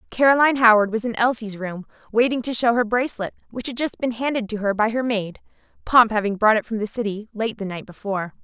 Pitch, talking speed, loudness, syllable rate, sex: 225 Hz, 230 wpm, -21 LUFS, 6.2 syllables/s, female